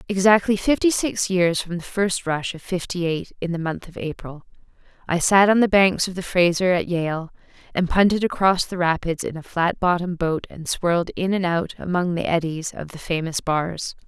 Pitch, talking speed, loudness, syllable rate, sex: 180 Hz, 205 wpm, -21 LUFS, 5.0 syllables/s, female